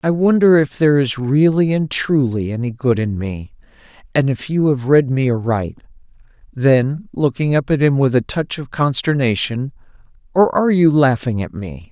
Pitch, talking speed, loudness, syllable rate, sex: 135 Hz, 175 wpm, -16 LUFS, 4.8 syllables/s, male